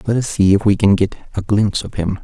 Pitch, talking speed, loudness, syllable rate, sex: 105 Hz, 295 wpm, -16 LUFS, 6.4 syllables/s, male